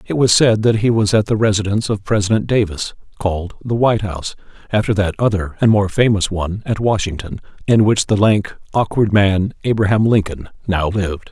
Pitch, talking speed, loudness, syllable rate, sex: 105 Hz, 185 wpm, -16 LUFS, 5.6 syllables/s, male